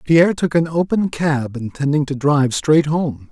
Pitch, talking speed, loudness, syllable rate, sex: 150 Hz, 180 wpm, -17 LUFS, 4.7 syllables/s, male